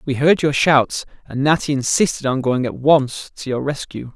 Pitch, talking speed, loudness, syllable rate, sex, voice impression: 140 Hz, 200 wpm, -18 LUFS, 4.7 syllables/s, male, masculine, slightly adult-like, fluent, cool, slightly refreshing, slightly calm, slightly sweet